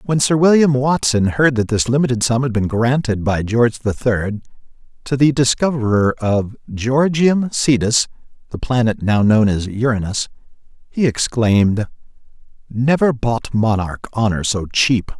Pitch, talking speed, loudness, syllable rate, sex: 120 Hz, 135 wpm, -17 LUFS, 4.5 syllables/s, male